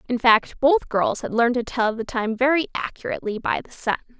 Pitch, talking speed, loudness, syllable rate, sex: 245 Hz, 215 wpm, -22 LUFS, 5.8 syllables/s, female